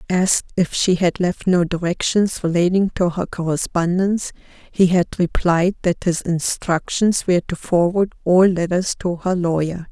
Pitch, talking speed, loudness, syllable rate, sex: 175 Hz, 150 wpm, -19 LUFS, 4.6 syllables/s, female